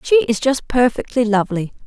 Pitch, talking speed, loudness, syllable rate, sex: 240 Hz, 160 wpm, -17 LUFS, 5.5 syllables/s, female